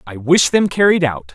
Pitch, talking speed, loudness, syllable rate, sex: 150 Hz, 225 wpm, -14 LUFS, 4.9 syllables/s, male